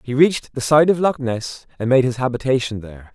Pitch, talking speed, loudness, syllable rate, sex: 130 Hz, 230 wpm, -18 LUFS, 5.8 syllables/s, male